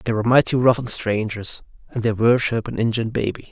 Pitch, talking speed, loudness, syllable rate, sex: 115 Hz, 205 wpm, -20 LUFS, 5.8 syllables/s, male